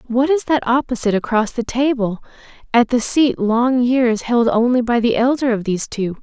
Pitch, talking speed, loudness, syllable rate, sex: 240 Hz, 195 wpm, -17 LUFS, 5.1 syllables/s, female